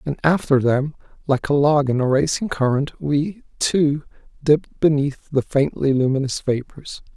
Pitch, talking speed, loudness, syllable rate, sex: 140 Hz, 150 wpm, -20 LUFS, 4.5 syllables/s, male